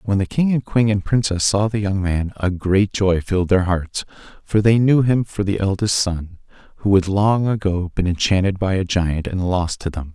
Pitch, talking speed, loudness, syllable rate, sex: 100 Hz, 230 wpm, -19 LUFS, 4.9 syllables/s, male